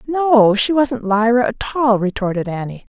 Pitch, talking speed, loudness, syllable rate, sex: 230 Hz, 165 wpm, -16 LUFS, 4.4 syllables/s, female